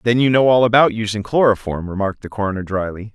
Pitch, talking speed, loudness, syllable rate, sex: 110 Hz, 210 wpm, -17 LUFS, 6.6 syllables/s, male